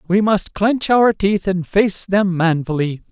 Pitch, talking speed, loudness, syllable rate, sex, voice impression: 190 Hz, 175 wpm, -17 LUFS, 3.9 syllables/s, male, masculine, adult-like, tensed, powerful, bright, slightly soft, muffled, friendly, slightly reassuring, unique, slightly wild, lively, intense, light